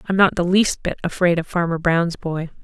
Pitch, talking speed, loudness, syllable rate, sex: 175 Hz, 230 wpm, -19 LUFS, 5.3 syllables/s, female